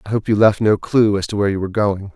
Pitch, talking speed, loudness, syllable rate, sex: 105 Hz, 335 wpm, -17 LUFS, 6.8 syllables/s, male